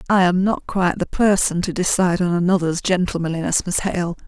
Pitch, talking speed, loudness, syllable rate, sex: 180 Hz, 180 wpm, -19 LUFS, 5.8 syllables/s, female